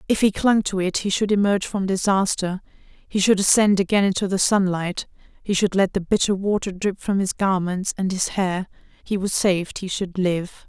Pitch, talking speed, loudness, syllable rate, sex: 190 Hz, 200 wpm, -21 LUFS, 5.0 syllables/s, female